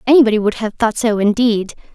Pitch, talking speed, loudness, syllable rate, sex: 220 Hz, 185 wpm, -15 LUFS, 6.2 syllables/s, female